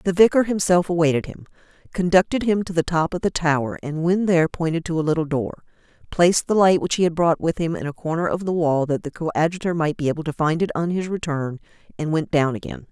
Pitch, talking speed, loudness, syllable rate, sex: 165 Hz, 240 wpm, -21 LUFS, 6.2 syllables/s, female